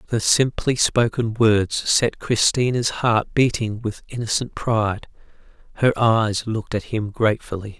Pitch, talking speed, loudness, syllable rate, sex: 110 Hz, 130 wpm, -20 LUFS, 4.3 syllables/s, male